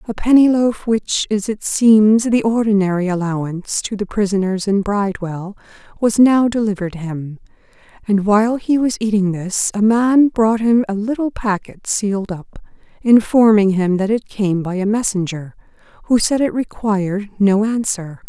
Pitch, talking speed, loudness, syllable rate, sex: 210 Hz, 160 wpm, -16 LUFS, 4.7 syllables/s, female